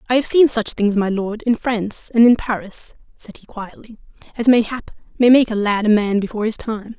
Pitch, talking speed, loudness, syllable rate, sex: 220 Hz, 225 wpm, -17 LUFS, 5.4 syllables/s, female